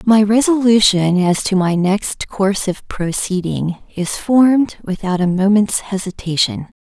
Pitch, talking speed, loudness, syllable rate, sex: 200 Hz, 130 wpm, -16 LUFS, 4.2 syllables/s, female